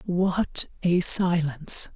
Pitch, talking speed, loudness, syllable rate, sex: 175 Hz, 90 wpm, -23 LUFS, 3.0 syllables/s, female